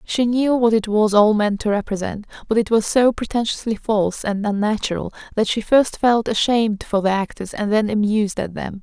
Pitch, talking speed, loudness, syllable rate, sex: 215 Hz, 205 wpm, -19 LUFS, 5.3 syllables/s, female